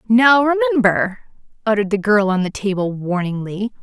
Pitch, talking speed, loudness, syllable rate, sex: 215 Hz, 140 wpm, -17 LUFS, 5.1 syllables/s, female